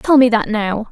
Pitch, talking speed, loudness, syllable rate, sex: 230 Hz, 260 wpm, -15 LUFS, 4.7 syllables/s, female